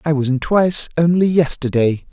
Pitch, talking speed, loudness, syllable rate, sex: 155 Hz, 170 wpm, -16 LUFS, 5.3 syllables/s, male